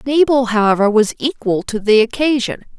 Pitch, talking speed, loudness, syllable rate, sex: 240 Hz, 150 wpm, -15 LUFS, 5.1 syllables/s, female